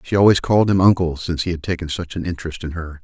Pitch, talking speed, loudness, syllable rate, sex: 85 Hz, 275 wpm, -19 LUFS, 7.2 syllables/s, male